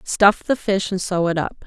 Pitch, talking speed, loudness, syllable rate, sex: 190 Hz, 250 wpm, -20 LUFS, 4.7 syllables/s, female